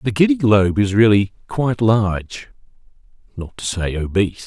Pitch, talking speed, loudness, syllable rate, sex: 110 Hz, 150 wpm, -17 LUFS, 5.3 syllables/s, male